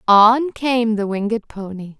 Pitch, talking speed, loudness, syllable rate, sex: 220 Hz, 150 wpm, -17 LUFS, 3.9 syllables/s, female